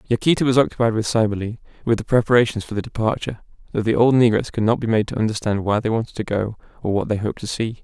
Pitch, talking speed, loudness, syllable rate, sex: 110 Hz, 245 wpm, -20 LUFS, 7.2 syllables/s, male